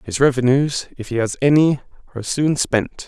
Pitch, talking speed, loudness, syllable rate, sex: 130 Hz, 175 wpm, -18 LUFS, 5.2 syllables/s, male